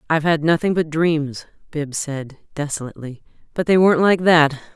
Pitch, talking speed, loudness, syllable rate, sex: 155 Hz, 165 wpm, -18 LUFS, 5.4 syllables/s, female